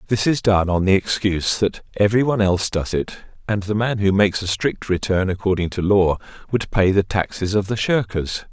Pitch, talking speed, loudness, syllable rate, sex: 100 Hz, 205 wpm, -20 LUFS, 5.4 syllables/s, male